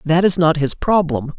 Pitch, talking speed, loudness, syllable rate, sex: 160 Hz, 215 wpm, -16 LUFS, 4.7 syllables/s, male